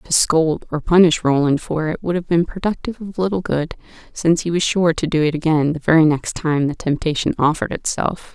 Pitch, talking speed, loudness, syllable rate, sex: 160 Hz, 215 wpm, -18 LUFS, 5.6 syllables/s, female